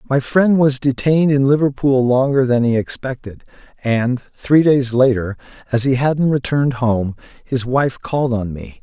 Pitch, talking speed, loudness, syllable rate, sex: 130 Hz, 165 wpm, -17 LUFS, 4.6 syllables/s, male